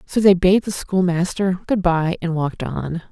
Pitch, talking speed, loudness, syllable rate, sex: 175 Hz, 195 wpm, -19 LUFS, 4.6 syllables/s, female